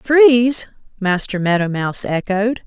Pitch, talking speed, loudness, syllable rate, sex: 210 Hz, 115 wpm, -16 LUFS, 3.9 syllables/s, female